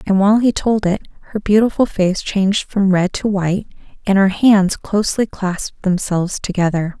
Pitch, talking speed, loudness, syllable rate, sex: 195 Hz, 170 wpm, -16 LUFS, 5.2 syllables/s, female